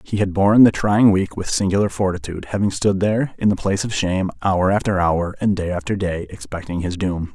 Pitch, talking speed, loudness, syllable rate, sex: 95 Hz, 220 wpm, -19 LUFS, 5.9 syllables/s, male